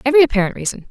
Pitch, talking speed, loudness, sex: 250 Hz, 200 wpm, -16 LUFS, female